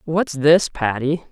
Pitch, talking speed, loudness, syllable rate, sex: 145 Hz, 135 wpm, -18 LUFS, 3.4 syllables/s, female